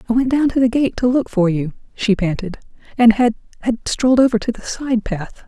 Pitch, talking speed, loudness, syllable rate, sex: 230 Hz, 220 wpm, -17 LUFS, 5.4 syllables/s, female